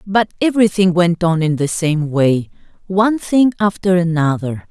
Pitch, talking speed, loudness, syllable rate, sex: 180 Hz, 155 wpm, -16 LUFS, 4.7 syllables/s, female